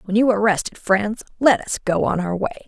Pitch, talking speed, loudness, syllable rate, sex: 205 Hz, 245 wpm, -20 LUFS, 6.0 syllables/s, female